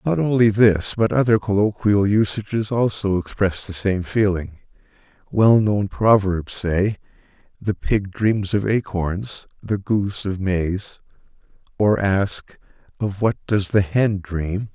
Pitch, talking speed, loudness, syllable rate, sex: 100 Hz, 130 wpm, -20 LUFS, 3.9 syllables/s, male